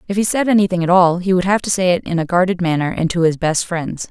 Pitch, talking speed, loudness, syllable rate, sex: 180 Hz, 305 wpm, -16 LUFS, 6.4 syllables/s, female